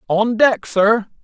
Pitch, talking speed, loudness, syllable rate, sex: 215 Hz, 145 wpm, -16 LUFS, 3.3 syllables/s, male